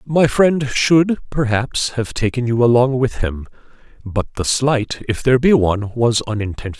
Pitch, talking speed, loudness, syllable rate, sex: 120 Hz, 170 wpm, -17 LUFS, 4.7 syllables/s, male